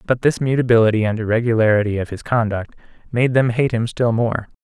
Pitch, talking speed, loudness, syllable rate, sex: 115 Hz, 180 wpm, -18 LUFS, 5.9 syllables/s, male